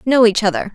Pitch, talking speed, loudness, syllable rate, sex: 230 Hz, 240 wpm, -15 LUFS, 6.4 syllables/s, female